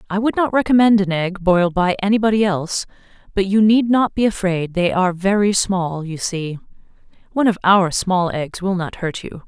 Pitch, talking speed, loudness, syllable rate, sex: 190 Hz, 195 wpm, -18 LUFS, 5.3 syllables/s, female